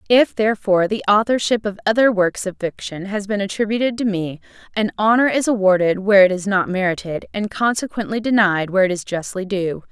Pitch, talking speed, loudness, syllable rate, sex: 200 Hz, 190 wpm, -18 LUFS, 5.9 syllables/s, female